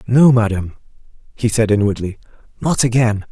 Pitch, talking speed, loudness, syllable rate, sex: 115 Hz, 125 wpm, -16 LUFS, 5.1 syllables/s, male